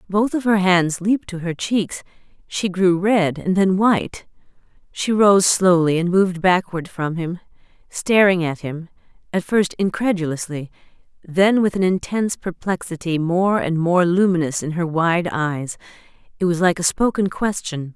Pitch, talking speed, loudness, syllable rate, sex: 180 Hz, 155 wpm, -19 LUFS, 4.5 syllables/s, female